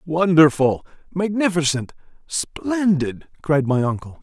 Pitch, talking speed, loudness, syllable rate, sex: 165 Hz, 85 wpm, -20 LUFS, 3.8 syllables/s, male